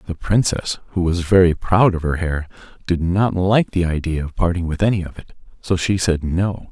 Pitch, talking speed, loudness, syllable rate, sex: 90 Hz, 215 wpm, -19 LUFS, 5.0 syllables/s, male